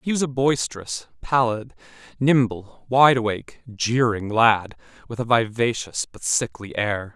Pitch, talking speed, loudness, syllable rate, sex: 115 Hz, 135 wpm, -22 LUFS, 4.4 syllables/s, male